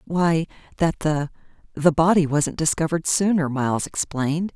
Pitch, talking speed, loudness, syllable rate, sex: 160 Hz, 120 wpm, -21 LUFS, 5.0 syllables/s, female